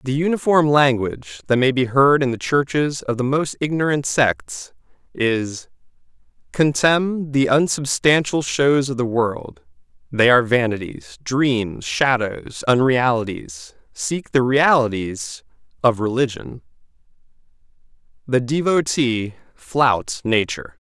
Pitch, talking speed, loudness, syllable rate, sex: 125 Hz, 110 wpm, -19 LUFS, 3.9 syllables/s, male